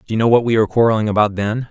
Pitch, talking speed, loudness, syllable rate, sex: 110 Hz, 315 wpm, -16 LUFS, 8.2 syllables/s, male